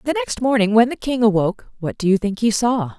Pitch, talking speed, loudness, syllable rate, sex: 225 Hz, 260 wpm, -19 LUFS, 5.9 syllables/s, female